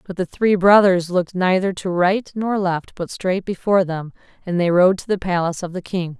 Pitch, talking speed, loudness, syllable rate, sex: 185 Hz, 225 wpm, -19 LUFS, 5.3 syllables/s, female